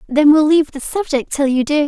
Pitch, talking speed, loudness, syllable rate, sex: 295 Hz, 255 wpm, -15 LUFS, 5.9 syllables/s, female